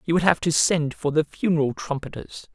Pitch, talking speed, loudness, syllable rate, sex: 155 Hz, 210 wpm, -22 LUFS, 5.4 syllables/s, male